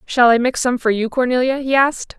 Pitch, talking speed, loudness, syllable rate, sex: 250 Hz, 245 wpm, -16 LUFS, 5.8 syllables/s, female